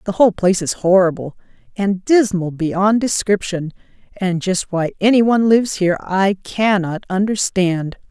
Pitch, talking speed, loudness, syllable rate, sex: 190 Hz, 135 wpm, -17 LUFS, 4.6 syllables/s, female